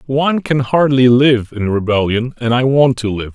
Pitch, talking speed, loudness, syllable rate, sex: 125 Hz, 195 wpm, -14 LUFS, 4.8 syllables/s, male